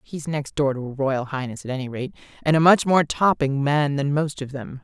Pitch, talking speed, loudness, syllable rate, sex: 145 Hz, 250 wpm, -22 LUFS, 5.2 syllables/s, female